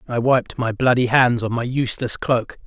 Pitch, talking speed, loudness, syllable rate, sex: 120 Hz, 200 wpm, -19 LUFS, 4.9 syllables/s, male